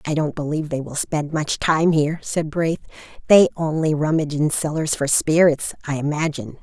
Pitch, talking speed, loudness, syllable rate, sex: 155 Hz, 180 wpm, -20 LUFS, 5.5 syllables/s, female